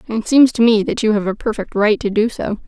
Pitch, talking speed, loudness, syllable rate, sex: 220 Hz, 290 wpm, -16 LUFS, 5.7 syllables/s, female